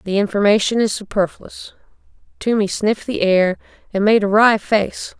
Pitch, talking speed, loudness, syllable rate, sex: 205 Hz, 150 wpm, -17 LUFS, 4.8 syllables/s, female